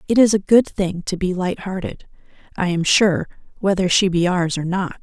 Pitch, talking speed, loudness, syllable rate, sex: 185 Hz, 205 wpm, -19 LUFS, 5.0 syllables/s, female